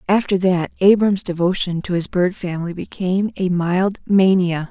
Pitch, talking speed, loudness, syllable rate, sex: 185 Hz, 155 wpm, -18 LUFS, 4.8 syllables/s, female